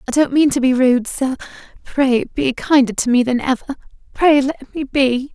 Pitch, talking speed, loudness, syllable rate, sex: 265 Hz, 190 wpm, -16 LUFS, 4.9 syllables/s, female